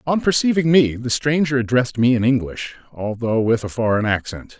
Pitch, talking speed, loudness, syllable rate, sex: 125 Hz, 185 wpm, -19 LUFS, 5.5 syllables/s, male